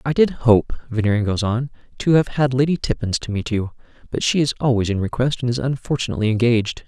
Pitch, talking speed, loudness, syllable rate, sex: 120 Hz, 210 wpm, -20 LUFS, 6.2 syllables/s, male